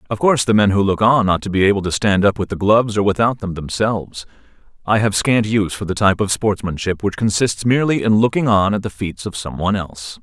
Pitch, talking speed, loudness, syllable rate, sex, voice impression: 100 Hz, 250 wpm, -17 LUFS, 6.3 syllables/s, male, very masculine, adult-like, slightly thick, slightly fluent, cool, slightly refreshing, sincere